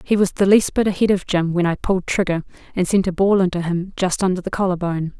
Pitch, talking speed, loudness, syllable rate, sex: 185 Hz, 265 wpm, -19 LUFS, 6.1 syllables/s, female